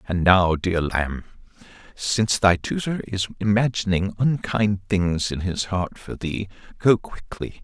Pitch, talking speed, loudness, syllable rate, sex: 95 Hz, 140 wpm, -22 LUFS, 4.0 syllables/s, male